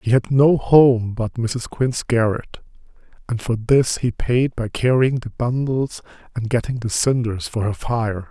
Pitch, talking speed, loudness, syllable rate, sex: 120 Hz, 175 wpm, -19 LUFS, 4.1 syllables/s, male